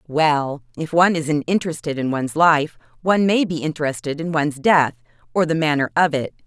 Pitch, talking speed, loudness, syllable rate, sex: 155 Hz, 175 wpm, -19 LUFS, 5.7 syllables/s, female